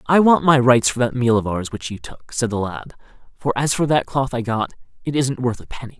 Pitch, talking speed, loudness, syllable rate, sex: 125 Hz, 270 wpm, -19 LUFS, 5.5 syllables/s, male